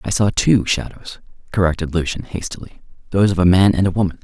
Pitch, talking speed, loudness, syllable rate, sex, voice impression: 95 Hz, 200 wpm, -17 LUFS, 6.3 syllables/s, male, masculine, adult-like, slightly thick, slightly intellectual, slightly calm, slightly elegant